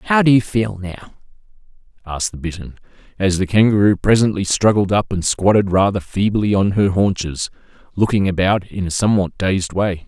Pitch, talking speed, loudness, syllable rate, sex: 100 Hz, 165 wpm, -17 LUFS, 5.2 syllables/s, male